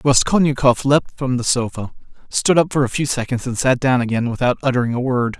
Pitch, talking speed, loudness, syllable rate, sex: 130 Hz, 210 wpm, -18 LUFS, 5.7 syllables/s, male